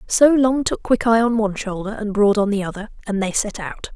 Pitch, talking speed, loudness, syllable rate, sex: 215 Hz, 245 wpm, -19 LUFS, 5.5 syllables/s, female